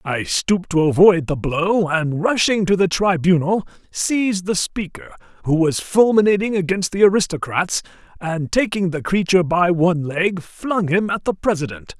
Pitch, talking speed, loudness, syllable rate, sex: 180 Hz, 160 wpm, -18 LUFS, 4.8 syllables/s, male